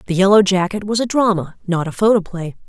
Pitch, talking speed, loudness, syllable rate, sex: 190 Hz, 200 wpm, -16 LUFS, 6.0 syllables/s, female